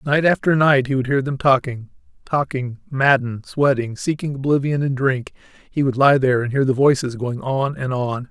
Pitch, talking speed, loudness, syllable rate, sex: 135 Hz, 195 wpm, -19 LUFS, 5.2 syllables/s, male